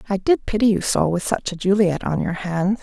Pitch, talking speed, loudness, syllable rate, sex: 190 Hz, 255 wpm, -20 LUFS, 5.3 syllables/s, female